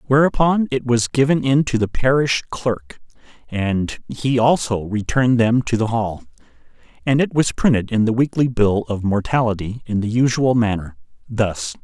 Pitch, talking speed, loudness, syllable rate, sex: 120 Hz, 160 wpm, -19 LUFS, 4.7 syllables/s, male